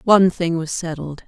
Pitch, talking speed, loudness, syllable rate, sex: 170 Hz, 190 wpm, -20 LUFS, 5.3 syllables/s, female